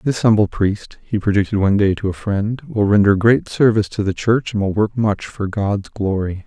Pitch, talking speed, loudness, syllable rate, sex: 105 Hz, 225 wpm, -18 LUFS, 5.1 syllables/s, male